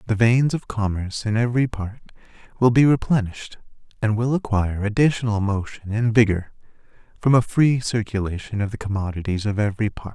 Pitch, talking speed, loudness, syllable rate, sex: 110 Hz, 160 wpm, -21 LUFS, 5.9 syllables/s, male